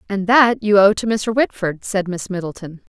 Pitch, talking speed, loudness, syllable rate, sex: 200 Hz, 205 wpm, -17 LUFS, 4.9 syllables/s, female